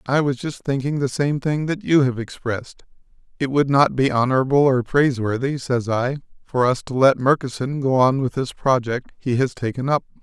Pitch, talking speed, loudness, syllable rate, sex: 135 Hz, 200 wpm, -20 LUFS, 5.2 syllables/s, male